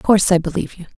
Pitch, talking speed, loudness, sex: 170 Hz, 300 wpm, -17 LUFS, female